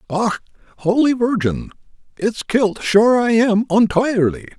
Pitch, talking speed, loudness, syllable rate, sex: 215 Hz, 120 wpm, -17 LUFS, 4.1 syllables/s, male